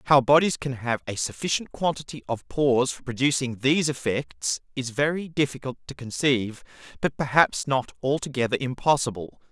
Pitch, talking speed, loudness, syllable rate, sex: 135 Hz, 145 wpm, -25 LUFS, 5.3 syllables/s, male